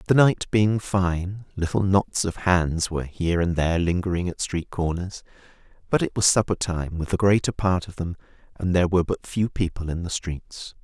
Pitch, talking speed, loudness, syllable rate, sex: 90 Hz, 200 wpm, -24 LUFS, 5.1 syllables/s, male